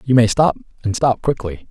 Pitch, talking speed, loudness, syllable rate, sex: 115 Hz, 210 wpm, -18 LUFS, 5.0 syllables/s, male